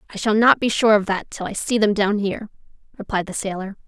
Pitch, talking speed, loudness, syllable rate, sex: 210 Hz, 250 wpm, -20 LUFS, 6.3 syllables/s, female